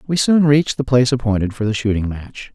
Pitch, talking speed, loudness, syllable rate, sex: 125 Hz, 235 wpm, -17 LUFS, 6.3 syllables/s, male